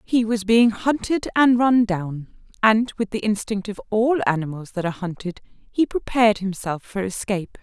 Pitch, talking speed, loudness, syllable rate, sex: 210 Hz, 175 wpm, -21 LUFS, 4.9 syllables/s, female